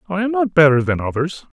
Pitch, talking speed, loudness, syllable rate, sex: 170 Hz, 225 wpm, -17 LUFS, 6.4 syllables/s, male